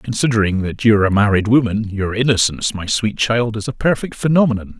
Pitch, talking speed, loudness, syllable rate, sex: 110 Hz, 200 wpm, -17 LUFS, 6.1 syllables/s, male